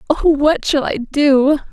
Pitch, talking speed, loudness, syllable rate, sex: 290 Hz, 175 wpm, -15 LUFS, 4.2 syllables/s, female